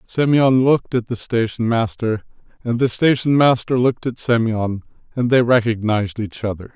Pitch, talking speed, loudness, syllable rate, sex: 120 Hz, 160 wpm, -18 LUFS, 5.1 syllables/s, male